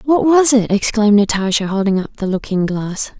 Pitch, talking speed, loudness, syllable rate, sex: 215 Hz, 190 wpm, -15 LUFS, 5.2 syllables/s, female